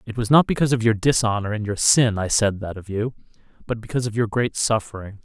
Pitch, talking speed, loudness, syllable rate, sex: 110 Hz, 240 wpm, -21 LUFS, 6.3 syllables/s, male